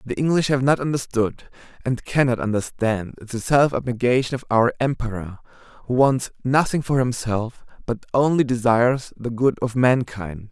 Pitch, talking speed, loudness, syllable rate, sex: 125 Hz, 150 wpm, -21 LUFS, 4.8 syllables/s, male